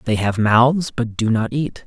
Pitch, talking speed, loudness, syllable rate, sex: 120 Hz, 225 wpm, -18 LUFS, 4.1 syllables/s, male